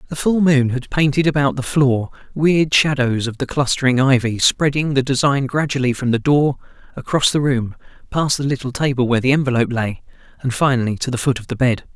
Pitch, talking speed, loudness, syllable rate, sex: 135 Hz, 200 wpm, -18 LUFS, 5.7 syllables/s, male